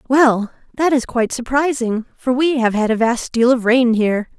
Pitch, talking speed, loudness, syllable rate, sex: 245 Hz, 205 wpm, -17 LUFS, 4.9 syllables/s, female